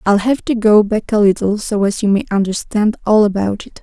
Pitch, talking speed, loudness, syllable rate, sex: 210 Hz, 235 wpm, -15 LUFS, 5.3 syllables/s, female